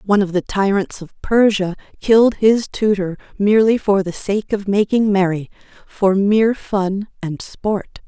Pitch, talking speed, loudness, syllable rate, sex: 200 Hz, 155 wpm, -17 LUFS, 4.4 syllables/s, female